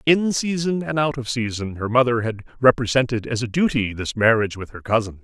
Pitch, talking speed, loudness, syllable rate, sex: 125 Hz, 205 wpm, -21 LUFS, 5.7 syllables/s, male